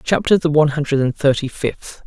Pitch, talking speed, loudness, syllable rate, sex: 145 Hz, 205 wpm, -17 LUFS, 5.6 syllables/s, male